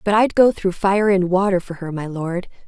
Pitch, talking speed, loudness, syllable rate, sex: 190 Hz, 245 wpm, -19 LUFS, 5.0 syllables/s, female